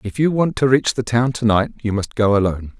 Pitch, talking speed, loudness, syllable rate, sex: 115 Hz, 280 wpm, -18 LUFS, 5.8 syllables/s, male